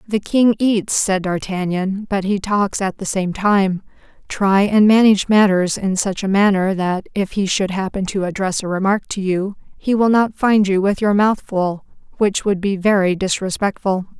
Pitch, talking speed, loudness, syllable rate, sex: 195 Hz, 185 wpm, -17 LUFS, 4.5 syllables/s, female